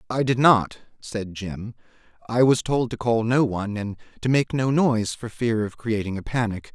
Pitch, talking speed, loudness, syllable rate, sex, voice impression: 115 Hz, 205 wpm, -23 LUFS, 4.9 syllables/s, male, very masculine, very adult-like, middle-aged, very thick, tensed, very powerful, bright, soft, slightly muffled, fluent, cool, intellectual, slightly refreshing, very sincere, very calm, mature, friendly, reassuring, slightly unique, elegant, slightly wild, slightly sweet, very lively, kind, slightly modest